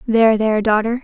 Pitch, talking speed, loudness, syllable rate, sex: 220 Hz, 175 wpm, -15 LUFS, 6.7 syllables/s, female